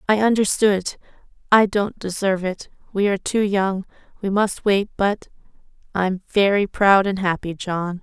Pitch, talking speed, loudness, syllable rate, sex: 195 Hz, 125 wpm, -20 LUFS, 4.5 syllables/s, female